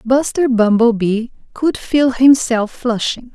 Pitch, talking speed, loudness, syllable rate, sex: 240 Hz, 110 wpm, -15 LUFS, 3.6 syllables/s, female